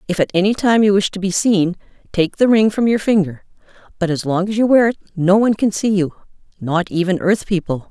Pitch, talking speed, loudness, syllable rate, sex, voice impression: 195 Hz, 230 wpm, -16 LUFS, 5.8 syllables/s, female, very feminine, very middle-aged, slightly thin, tensed, powerful, slightly dark, hard, clear, fluent, cool, very intellectual, refreshing, very sincere, calm, friendly, reassuring, unique, elegant, wild, slightly sweet, lively, strict, slightly intense, slightly sharp